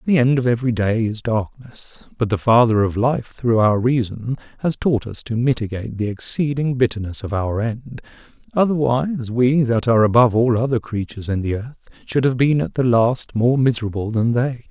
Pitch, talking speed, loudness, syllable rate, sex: 120 Hz, 190 wpm, -19 LUFS, 5.3 syllables/s, male